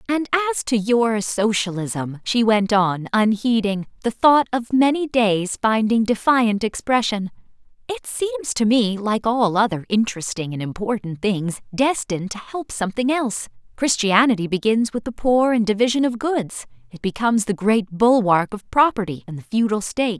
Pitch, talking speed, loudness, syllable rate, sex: 220 Hz, 150 wpm, -20 LUFS, 4.8 syllables/s, female